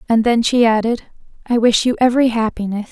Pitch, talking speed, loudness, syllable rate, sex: 230 Hz, 185 wpm, -16 LUFS, 6.0 syllables/s, female